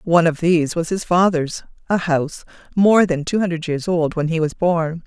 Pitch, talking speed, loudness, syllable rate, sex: 170 Hz, 215 wpm, -19 LUFS, 5.2 syllables/s, female